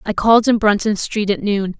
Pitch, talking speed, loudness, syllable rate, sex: 210 Hz, 235 wpm, -16 LUFS, 5.5 syllables/s, female